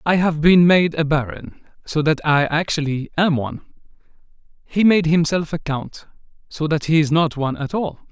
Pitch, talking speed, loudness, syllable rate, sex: 160 Hz, 185 wpm, -18 LUFS, 5.0 syllables/s, male